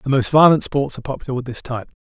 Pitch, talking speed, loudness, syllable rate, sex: 135 Hz, 265 wpm, -18 LUFS, 7.4 syllables/s, male